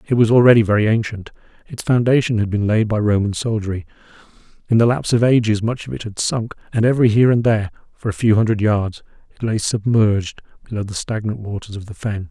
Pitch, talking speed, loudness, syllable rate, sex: 110 Hz, 210 wpm, -18 LUFS, 6.4 syllables/s, male